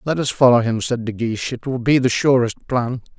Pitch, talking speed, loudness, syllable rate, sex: 125 Hz, 245 wpm, -18 LUFS, 5.6 syllables/s, male